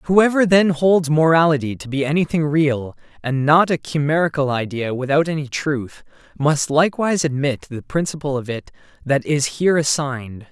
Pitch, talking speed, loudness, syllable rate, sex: 150 Hz, 155 wpm, -18 LUFS, 5.1 syllables/s, male